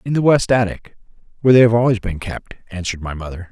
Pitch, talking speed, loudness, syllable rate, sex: 110 Hz, 220 wpm, -17 LUFS, 6.6 syllables/s, male